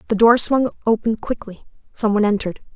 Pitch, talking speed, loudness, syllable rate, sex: 220 Hz, 150 wpm, -18 LUFS, 6.4 syllables/s, female